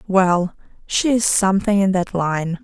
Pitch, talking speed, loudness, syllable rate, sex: 190 Hz, 135 wpm, -18 LUFS, 3.7 syllables/s, female